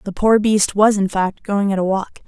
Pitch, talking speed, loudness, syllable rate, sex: 200 Hz, 265 wpm, -17 LUFS, 4.7 syllables/s, female